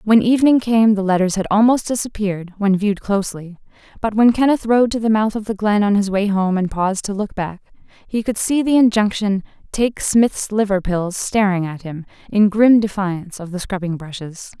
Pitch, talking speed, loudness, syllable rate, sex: 205 Hz, 200 wpm, -17 LUFS, 5.3 syllables/s, female